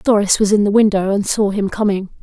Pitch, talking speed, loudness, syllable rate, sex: 205 Hz, 240 wpm, -15 LUFS, 5.9 syllables/s, female